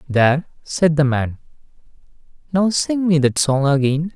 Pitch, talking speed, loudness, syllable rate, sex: 150 Hz, 145 wpm, -18 LUFS, 4.4 syllables/s, male